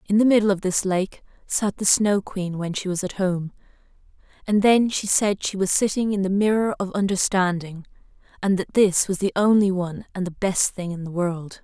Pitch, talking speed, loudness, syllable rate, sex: 190 Hz, 210 wpm, -22 LUFS, 5.1 syllables/s, female